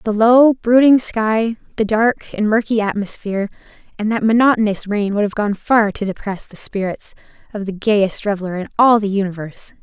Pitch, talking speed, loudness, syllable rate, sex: 210 Hz, 175 wpm, -17 LUFS, 5.2 syllables/s, female